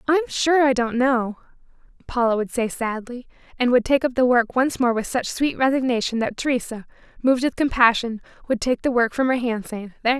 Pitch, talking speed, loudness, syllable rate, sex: 245 Hz, 200 wpm, -21 LUFS, 5.5 syllables/s, female